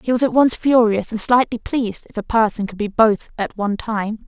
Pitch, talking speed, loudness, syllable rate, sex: 225 Hz, 240 wpm, -18 LUFS, 5.4 syllables/s, female